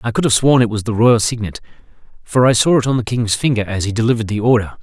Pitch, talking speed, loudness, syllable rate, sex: 115 Hz, 275 wpm, -15 LUFS, 6.8 syllables/s, male